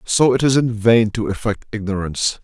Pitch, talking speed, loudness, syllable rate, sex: 110 Hz, 195 wpm, -18 LUFS, 5.2 syllables/s, male